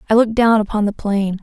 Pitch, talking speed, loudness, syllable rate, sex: 215 Hz, 250 wpm, -16 LUFS, 6.6 syllables/s, female